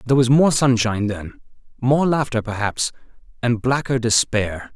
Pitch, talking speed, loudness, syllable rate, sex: 120 Hz, 140 wpm, -19 LUFS, 4.9 syllables/s, male